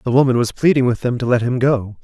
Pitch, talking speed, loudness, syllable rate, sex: 125 Hz, 295 wpm, -17 LUFS, 6.3 syllables/s, male